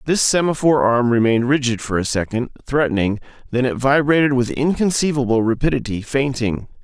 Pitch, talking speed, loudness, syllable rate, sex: 130 Hz, 140 wpm, -18 LUFS, 5.8 syllables/s, male